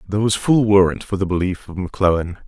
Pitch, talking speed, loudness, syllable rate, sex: 95 Hz, 220 wpm, -18 LUFS, 6.9 syllables/s, male